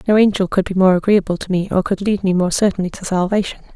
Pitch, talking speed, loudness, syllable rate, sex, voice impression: 190 Hz, 255 wpm, -17 LUFS, 6.7 syllables/s, female, feminine, slightly adult-like, soft, slightly muffled, sincere, calm